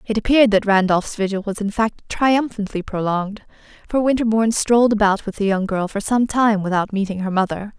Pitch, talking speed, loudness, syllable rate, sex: 210 Hz, 195 wpm, -19 LUFS, 5.7 syllables/s, female